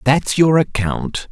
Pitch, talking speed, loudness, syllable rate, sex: 140 Hz, 135 wpm, -16 LUFS, 3.4 syllables/s, male